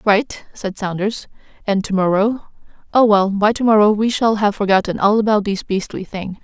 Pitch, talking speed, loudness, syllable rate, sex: 205 Hz, 175 wpm, -17 LUFS, 4.9 syllables/s, female